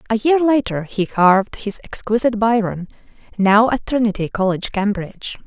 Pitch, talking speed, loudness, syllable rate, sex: 215 Hz, 145 wpm, -18 LUFS, 5.4 syllables/s, female